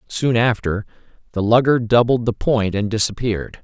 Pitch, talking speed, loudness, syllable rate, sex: 115 Hz, 150 wpm, -18 LUFS, 5.1 syllables/s, male